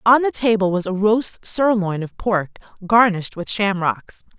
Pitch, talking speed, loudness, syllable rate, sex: 205 Hz, 165 wpm, -19 LUFS, 4.5 syllables/s, female